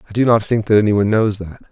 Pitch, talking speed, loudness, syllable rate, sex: 105 Hz, 280 wpm, -15 LUFS, 6.8 syllables/s, male